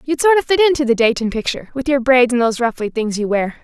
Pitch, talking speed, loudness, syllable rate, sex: 255 Hz, 280 wpm, -16 LUFS, 6.8 syllables/s, female